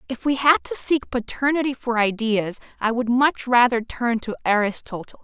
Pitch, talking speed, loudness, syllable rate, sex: 240 Hz, 170 wpm, -21 LUFS, 4.8 syllables/s, female